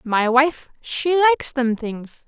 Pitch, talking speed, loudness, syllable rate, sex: 270 Hz, 130 wpm, -19 LUFS, 3.4 syllables/s, female